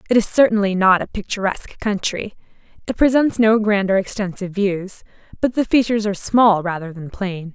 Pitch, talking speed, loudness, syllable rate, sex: 205 Hz, 175 wpm, -18 LUFS, 5.6 syllables/s, female